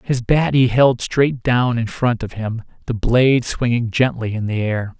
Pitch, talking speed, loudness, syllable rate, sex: 120 Hz, 205 wpm, -18 LUFS, 4.3 syllables/s, male